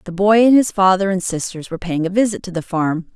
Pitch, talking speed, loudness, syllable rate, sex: 190 Hz, 265 wpm, -17 LUFS, 6.0 syllables/s, female